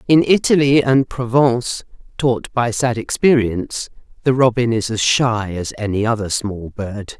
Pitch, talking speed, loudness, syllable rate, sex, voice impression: 120 Hz, 150 wpm, -17 LUFS, 4.4 syllables/s, female, feminine, gender-neutral, very adult-like, middle-aged, slightly thin, tensed, powerful, slightly bright, slightly hard, clear, fluent, cool, very intellectual, refreshing, sincere, calm, slightly friendly, slightly reassuring, very unique, elegant, slightly wild, sweet, lively, strict, intense